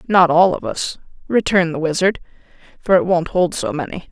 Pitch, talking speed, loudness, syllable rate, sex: 180 Hz, 190 wpm, -17 LUFS, 5.5 syllables/s, female